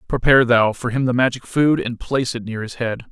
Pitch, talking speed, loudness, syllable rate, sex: 120 Hz, 250 wpm, -18 LUFS, 5.9 syllables/s, male